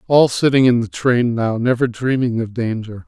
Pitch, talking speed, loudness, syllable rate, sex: 120 Hz, 195 wpm, -17 LUFS, 4.8 syllables/s, male